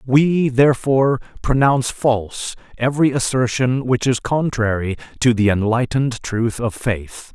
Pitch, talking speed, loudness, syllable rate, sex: 125 Hz, 125 wpm, -18 LUFS, 4.6 syllables/s, male